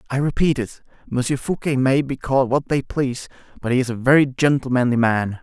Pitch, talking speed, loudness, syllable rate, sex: 130 Hz, 200 wpm, -20 LUFS, 5.8 syllables/s, male